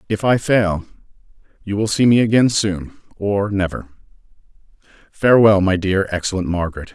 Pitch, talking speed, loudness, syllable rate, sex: 100 Hz, 140 wpm, -17 LUFS, 5.3 syllables/s, male